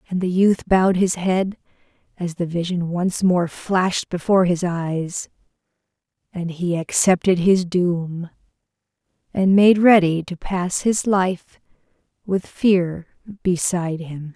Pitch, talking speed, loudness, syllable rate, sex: 180 Hz, 130 wpm, -20 LUFS, 3.9 syllables/s, female